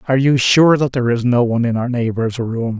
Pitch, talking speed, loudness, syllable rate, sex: 125 Hz, 260 wpm, -16 LUFS, 6.1 syllables/s, male